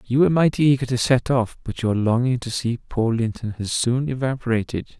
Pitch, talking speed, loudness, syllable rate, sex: 125 Hz, 205 wpm, -21 LUFS, 5.4 syllables/s, male